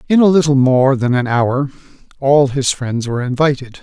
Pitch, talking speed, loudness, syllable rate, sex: 135 Hz, 190 wpm, -15 LUFS, 5.2 syllables/s, male